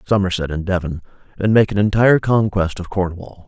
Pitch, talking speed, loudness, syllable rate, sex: 95 Hz, 175 wpm, -18 LUFS, 5.7 syllables/s, male